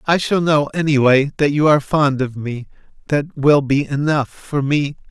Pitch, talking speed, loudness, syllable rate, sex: 145 Hz, 190 wpm, -17 LUFS, 4.6 syllables/s, male